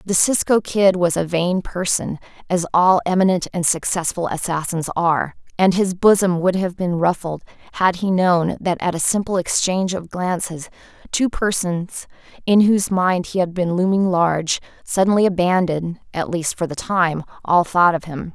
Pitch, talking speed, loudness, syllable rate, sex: 180 Hz, 170 wpm, -19 LUFS, 4.7 syllables/s, female